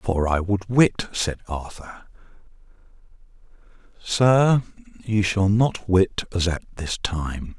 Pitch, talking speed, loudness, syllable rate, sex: 95 Hz, 120 wpm, -22 LUFS, 3.3 syllables/s, male